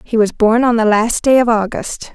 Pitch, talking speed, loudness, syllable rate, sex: 225 Hz, 250 wpm, -14 LUFS, 4.9 syllables/s, female